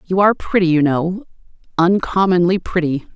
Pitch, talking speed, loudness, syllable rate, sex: 180 Hz, 115 wpm, -16 LUFS, 5.3 syllables/s, female